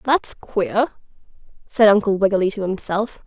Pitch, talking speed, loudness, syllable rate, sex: 210 Hz, 130 wpm, -19 LUFS, 4.6 syllables/s, female